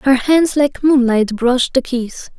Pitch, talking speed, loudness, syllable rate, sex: 260 Hz, 175 wpm, -15 LUFS, 3.5 syllables/s, female